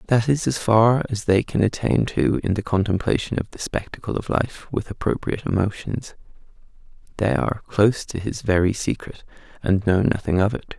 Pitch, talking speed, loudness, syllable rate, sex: 105 Hz, 180 wpm, -22 LUFS, 5.3 syllables/s, male